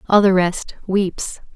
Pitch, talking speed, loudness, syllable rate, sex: 200 Hz, 155 wpm, -18 LUFS, 3.5 syllables/s, female